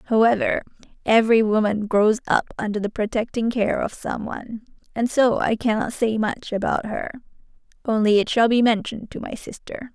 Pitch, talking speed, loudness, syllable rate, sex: 220 Hz, 170 wpm, -21 LUFS, 5.2 syllables/s, female